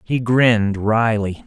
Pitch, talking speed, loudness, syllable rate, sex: 110 Hz, 125 wpm, -17 LUFS, 3.7 syllables/s, male